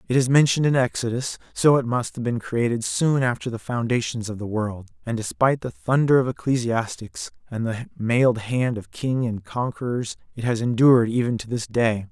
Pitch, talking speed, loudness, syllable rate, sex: 120 Hz, 195 wpm, -23 LUFS, 5.4 syllables/s, male